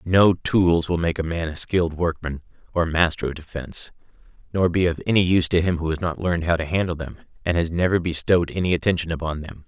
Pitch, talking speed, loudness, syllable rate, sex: 85 Hz, 225 wpm, -22 LUFS, 6.2 syllables/s, male